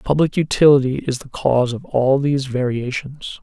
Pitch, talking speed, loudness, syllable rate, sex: 135 Hz, 160 wpm, -18 LUFS, 5.2 syllables/s, male